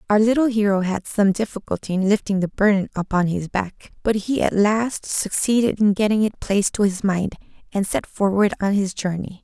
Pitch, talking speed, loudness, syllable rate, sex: 200 Hz, 195 wpm, -21 LUFS, 5.2 syllables/s, female